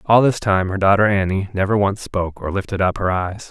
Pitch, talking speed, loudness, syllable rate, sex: 100 Hz, 240 wpm, -18 LUFS, 5.7 syllables/s, male